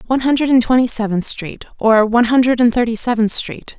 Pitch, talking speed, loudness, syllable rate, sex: 235 Hz, 190 wpm, -15 LUFS, 6.0 syllables/s, female